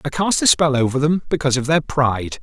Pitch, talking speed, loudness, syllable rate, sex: 140 Hz, 250 wpm, -17 LUFS, 6.2 syllables/s, male